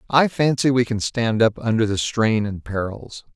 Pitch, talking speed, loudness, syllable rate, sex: 115 Hz, 195 wpm, -20 LUFS, 4.5 syllables/s, male